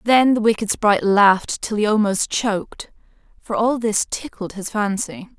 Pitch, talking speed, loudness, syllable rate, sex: 215 Hz, 165 wpm, -19 LUFS, 4.6 syllables/s, female